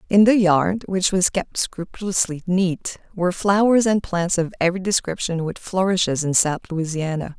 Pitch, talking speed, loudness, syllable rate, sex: 180 Hz, 165 wpm, -20 LUFS, 4.9 syllables/s, female